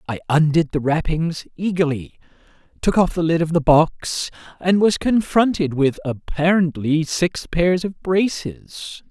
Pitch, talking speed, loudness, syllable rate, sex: 165 Hz, 140 wpm, -19 LUFS, 3.9 syllables/s, male